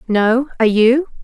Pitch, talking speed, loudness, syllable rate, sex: 240 Hz, 145 wpm, -14 LUFS, 4.8 syllables/s, female